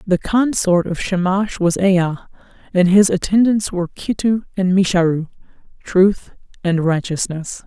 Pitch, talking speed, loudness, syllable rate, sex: 185 Hz, 125 wpm, -17 LUFS, 4.4 syllables/s, female